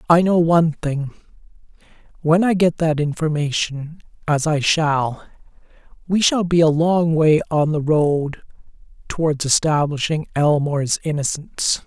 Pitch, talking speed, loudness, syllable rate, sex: 155 Hz, 110 wpm, -18 LUFS, 4.4 syllables/s, male